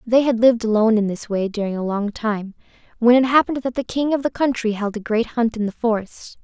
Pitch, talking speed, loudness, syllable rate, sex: 230 Hz, 250 wpm, -20 LUFS, 6.0 syllables/s, female